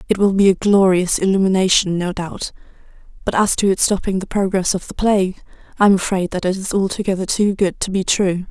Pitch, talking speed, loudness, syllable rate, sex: 190 Hz, 210 wpm, -17 LUFS, 5.8 syllables/s, female